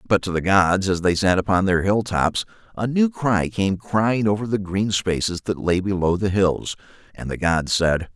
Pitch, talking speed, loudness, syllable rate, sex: 100 Hz, 205 wpm, -21 LUFS, 4.6 syllables/s, male